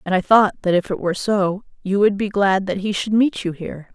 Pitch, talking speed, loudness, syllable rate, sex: 195 Hz, 275 wpm, -19 LUFS, 5.7 syllables/s, female